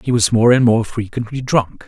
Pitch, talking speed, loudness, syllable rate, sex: 115 Hz, 225 wpm, -16 LUFS, 5.1 syllables/s, male